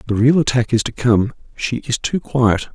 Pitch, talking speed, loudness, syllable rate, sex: 125 Hz, 195 wpm, -18 LUFS, 4.8 syllables/s, male